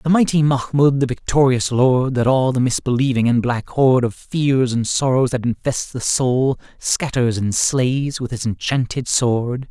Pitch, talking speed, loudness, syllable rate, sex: 130 Hz, 175 wpm, -18 LUFS, 4.4 syllables/s, male